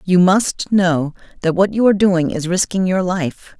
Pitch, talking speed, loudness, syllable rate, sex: 185 Hz, 200 wpm, -16 LUFS, 4.4 syllables/s, female